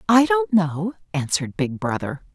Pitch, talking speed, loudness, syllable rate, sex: 180 Hz, 155 wpm, -22 LUFS, 4.7 syllables/s, female